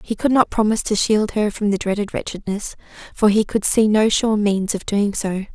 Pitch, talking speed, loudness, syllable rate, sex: 210 Hz, 225 wpm, -19 LUFS, 5.2 syllables/s, female